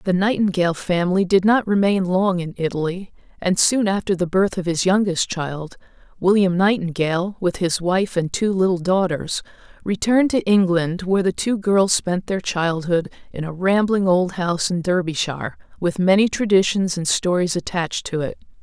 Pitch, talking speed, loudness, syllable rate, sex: 185 Hz, 165 wpm, -20 LUFS, 5.0 syllables/s, female